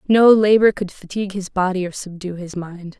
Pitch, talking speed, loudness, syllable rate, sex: 190 Hz, 200 wpm, -18 LUFS, 5.3 syllables/s, female